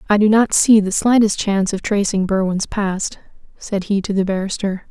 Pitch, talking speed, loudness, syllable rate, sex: 200 Hz, 195 wpm, -17 LUFS, 5.1 syllables/s, female